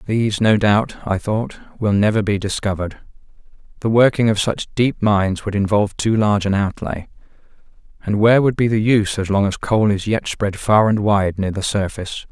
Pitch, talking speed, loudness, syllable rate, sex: 105 Hz, 195 wpm, -18 LUFS, 5.3 syllables/s, male